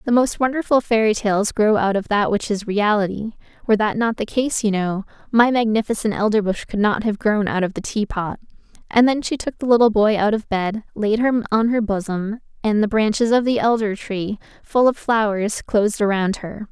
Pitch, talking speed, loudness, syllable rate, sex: 215 Hz, 210 wpm, -19 LUFS, 5.2 syllables/s, female